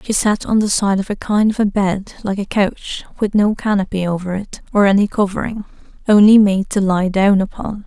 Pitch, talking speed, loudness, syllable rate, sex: 200 Hz, 215 wpm, -16 LUFS, 5.1 syllables/s, female